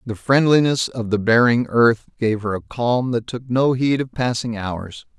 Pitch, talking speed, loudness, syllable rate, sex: 120 Hz, 195 wpm, -19 LUFS, 4.3 syllables/s, male